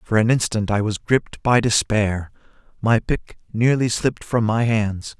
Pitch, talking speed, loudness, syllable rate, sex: 110 Hz, 175 wpm, -20 LUFS, 4.5 syllables/s, male